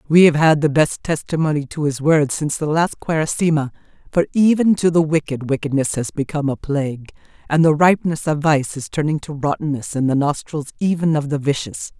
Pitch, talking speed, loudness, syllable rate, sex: 150 Hz, 195 wpm, -18 LUFS, 5.7 syllables/s, female